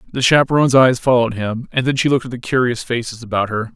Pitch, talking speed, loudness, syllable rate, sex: 125 Hz, 240 wpm, -16 LUFS, 7.1 syllables/s, male